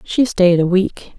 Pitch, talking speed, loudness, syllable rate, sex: 190 Hz, 200 wpm, -15 LUFS, 3.7 syllables/s, female